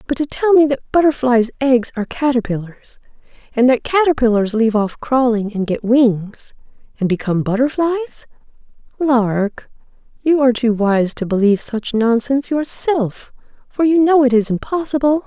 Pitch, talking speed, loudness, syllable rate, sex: 250 Hz, 140 wpm, -16 LUFS, 5.4 syllables/s, female